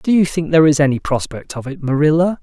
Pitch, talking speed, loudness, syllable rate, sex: 150 Hz, 250 wpm, -16 LUFS, 6.3 syllables/s, male